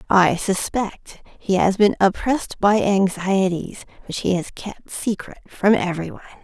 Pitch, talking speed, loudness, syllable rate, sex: 195 Hz, 150 wpm, -20 LUFS, 4.5 syllables/s, female